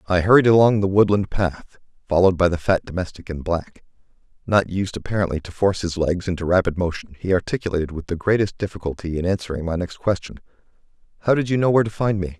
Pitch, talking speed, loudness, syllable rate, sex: 95 Hz, 205 wpm, -21 LUFS, 6.5 syllables/s, male